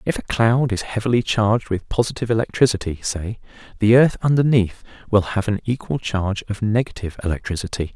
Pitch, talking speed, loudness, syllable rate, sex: 110 Hz, 160 wpm, -20 LUFS, 6.0 syllables/s, male